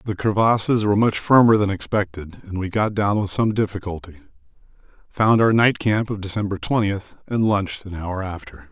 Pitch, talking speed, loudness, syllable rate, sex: 100 Hz, 180 wpm, -20 LUFS, 5.4 syllables/s, male